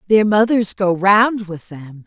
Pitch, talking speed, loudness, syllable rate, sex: 195 Hz, 175 wpm, -15 LUFS, 3.7 syllables/s, female